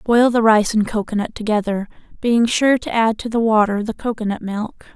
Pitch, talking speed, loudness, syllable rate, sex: 220 Hz, 195 wpm, -18 LUFS, 5.3 syllables/s, female